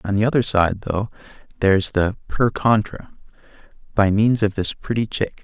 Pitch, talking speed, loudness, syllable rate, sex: 105 Hz, 165 wpm, -20 LUFS, 4.9 syllables/s, male